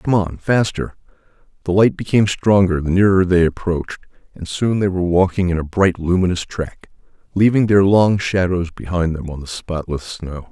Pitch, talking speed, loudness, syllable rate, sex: 90 Hz, 175 wpm, -17 LUFS, 5.2 syllables/s, male